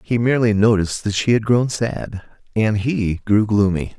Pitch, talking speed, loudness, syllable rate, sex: 105 Hz, 180 wpm, -18 LUFS, 4.6 syllables/s, male